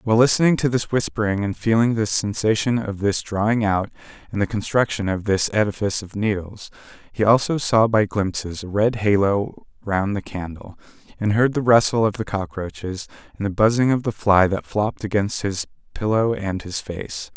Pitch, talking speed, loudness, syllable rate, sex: 105 Hz, 185 wpm, -21 LUFS, 5.2 syllables/s, male